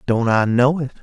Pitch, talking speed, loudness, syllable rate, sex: 125 Hz, 235 wpm, -17 LUFS, 5.0 syllables/s, male